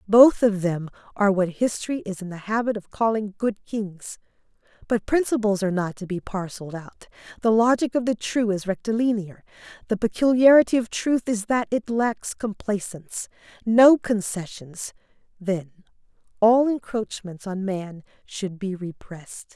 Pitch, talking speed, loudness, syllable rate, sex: 210 Hz, 145 wpm, -23 LUFS, 4.8 syllables/s, female